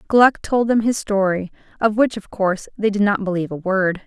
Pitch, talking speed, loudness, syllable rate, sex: 205 Hz, 220 wpm, -19 LUFS, 5.4 syllables/s, female